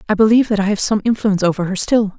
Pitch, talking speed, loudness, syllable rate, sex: 205 Hz, 275 wpm, -16 LUFS, 7.6 syllables/s, female